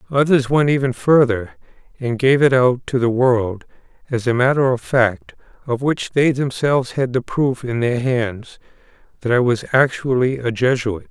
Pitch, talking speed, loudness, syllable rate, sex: 125 Hz, 175 wpm, -18 LUFS, 4.5 syllables/s, male